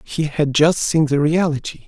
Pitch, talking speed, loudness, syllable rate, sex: 150 Hz, 190 wpm, -17 LUFS, 4.5 syllables/s, male